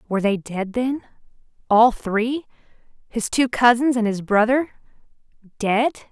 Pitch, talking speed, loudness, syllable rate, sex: 230 Hz, 100 wpm, -20 LUFS, 3.9 syllables/s, female